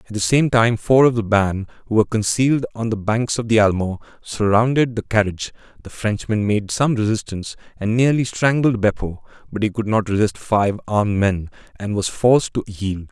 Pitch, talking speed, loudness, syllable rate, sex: 110 Hz, 190 wpm, -19 LUFS, 5.3 syllables/s, male